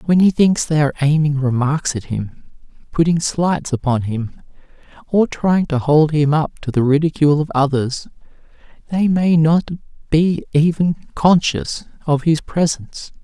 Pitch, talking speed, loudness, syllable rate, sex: 155 Hz, 150 wpm, -17 LUFS, 4.5 syllables/s, male